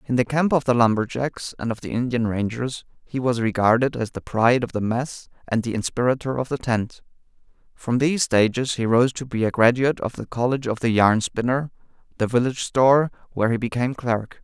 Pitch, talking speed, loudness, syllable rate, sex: 120 Hz, 205 wpm, -22 LUFS, 5.8 syllables/s, male